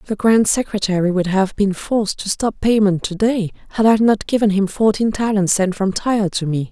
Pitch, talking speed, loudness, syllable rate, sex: 205 Hz, 215 wpm, -17 LUFS, 5.3 syllables/s, female